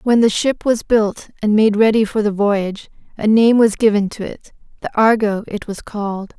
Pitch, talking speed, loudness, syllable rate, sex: 215 Hz, 195 wpm, -16 LUFS, 4.8 syllables/s, female